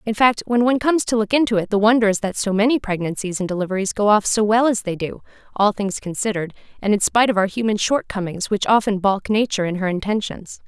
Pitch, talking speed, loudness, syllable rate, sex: 210 Hz, 235 wpm, -19 LUFS, 6.5 syllables/s, female